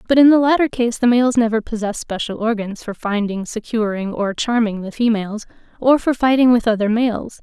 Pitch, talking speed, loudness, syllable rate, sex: 225 Hz, 195 wpm, -18 LUFS, 5.4 syllables/s, female